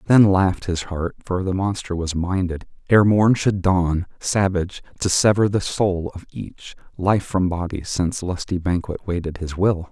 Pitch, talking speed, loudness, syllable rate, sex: 90 Hz, 175 wpm, -21 LUFS, 4.6 syllables/s, male